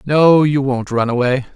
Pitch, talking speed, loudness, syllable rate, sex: 135 Hz, 195 wpm, -15 LUFS, 4.4 syllables/s, male